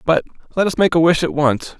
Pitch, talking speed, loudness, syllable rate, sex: 155 Hz, 265 wpm, -17 LUFS, 5.9 syllables/s, male